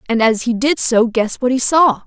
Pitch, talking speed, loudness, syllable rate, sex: 245 Hz, 260 wpm, -15 LUFS, 5.0 syllables/s, female